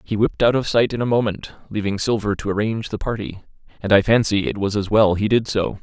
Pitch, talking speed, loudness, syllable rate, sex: 105 Hz, 245 wpm, -20 LUFS, 6.1 syllables/s, male